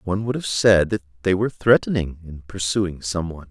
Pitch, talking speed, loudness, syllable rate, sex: 95 Hz, 205 wpm, -21 LUFS, 5.7 syllables/s, male